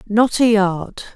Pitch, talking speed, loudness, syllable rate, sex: 210 Hz, 155 wpm, -16 LUFS, 3.4 syllables/s, female